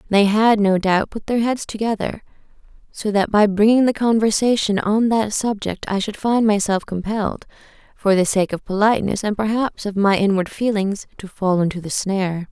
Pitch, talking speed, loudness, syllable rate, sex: 205 Hz, 180 wpm, -19 LUFS, 5.1 syllables/s, female